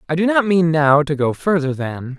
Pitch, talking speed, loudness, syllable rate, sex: 160 Hz, 250 wpm, -17 LUFS, 5.0 syllables/s, male